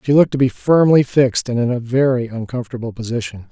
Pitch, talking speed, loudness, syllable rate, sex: 125 Hz, 205 wpm, -17 LUFS, 6.5 syllables/s, male